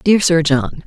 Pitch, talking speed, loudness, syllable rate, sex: 165 Hz, 210 wpm, -15 LUFS, 3.6 syllables/s, male